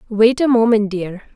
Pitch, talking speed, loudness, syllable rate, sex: 220 Hz, 175 wpm, -15 LUFS, 4.7 syllables/s, female